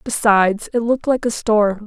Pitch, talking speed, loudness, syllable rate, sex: 220 Hz, 195 wpm, -17 LUFS, 5.2 syllables/s, female